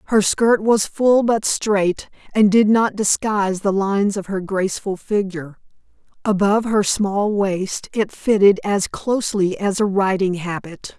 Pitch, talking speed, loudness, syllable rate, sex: 200 Hz, 155 wpm, -18 LUFS, 4.3 syllables/s, female